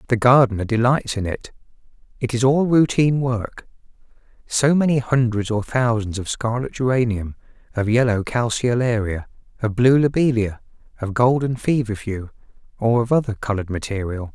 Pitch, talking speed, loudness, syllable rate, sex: 120 Hz, 135 wpm, -20 LUFS, 5.1 syllables/s, male